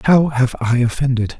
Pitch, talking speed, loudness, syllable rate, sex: 130 Hz, 170 wpm, -17 LUFS, 5.1 syllables/s, male